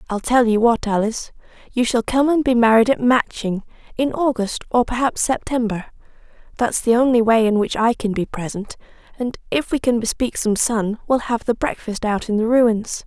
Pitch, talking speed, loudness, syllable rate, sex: 230 Hz, 195 wpm, -19 LUFS, 5.1 syllables/s, female